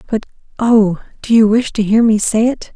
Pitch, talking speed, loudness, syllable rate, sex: 220 Hz, 175 wpm, -14 LUFS, 4.8 syllables/s, female